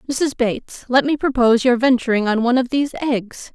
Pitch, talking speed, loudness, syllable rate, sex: 250 Hz, 205 wpm, -18 LUFS, 5.9 syllables/s, female